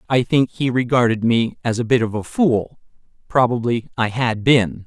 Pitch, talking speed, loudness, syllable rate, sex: 120 Hz, 185 wpm, -18 LUFS, 4.7 syllables/s, male